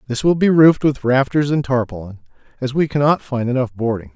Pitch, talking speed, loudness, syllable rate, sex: 135 Hz, 200 wpm, -17 LUFS, 5.9 syllables/s, male